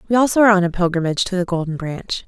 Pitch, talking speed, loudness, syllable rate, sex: 190 Hz, 265 wpm, -18 LUFS, 7.7 syllables/s, female